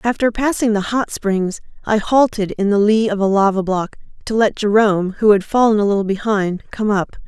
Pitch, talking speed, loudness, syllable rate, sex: 210 Hz, 205 wpm, -17 LUFS, 5.3 syllables/s, female